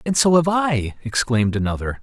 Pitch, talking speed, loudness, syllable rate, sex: 135 Hz, 180 wpm, -19 LUFS, 5.4 syllables/s, male